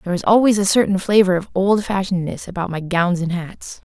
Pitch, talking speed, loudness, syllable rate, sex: 190 Hz, 215 wpm, -18 LUFS, 6.0 syllables/s, female